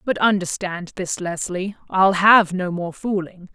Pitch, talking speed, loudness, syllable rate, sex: 185 Hz, 150 wpm, -20 LUFS, 4.0 syllables/s, female